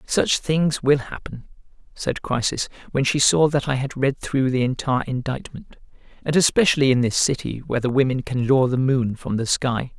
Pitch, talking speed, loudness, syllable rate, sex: 130 Hz, 190 wpm, -21 LUFS, 5.3 syllables/s, male